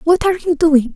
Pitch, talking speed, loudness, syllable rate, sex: 320 Hz, 250 wpm, -15 LUFS, 5.9 syllables/s, female